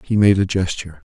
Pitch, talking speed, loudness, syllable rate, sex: 95 Hz, 215 wpm, -18 LUFS, 6.5 syllables/s, male